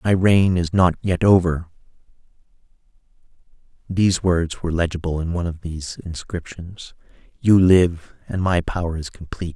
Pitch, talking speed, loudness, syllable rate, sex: 90 Hz, 125 wpm, -20 LUFS, 5.2 syllables/s, male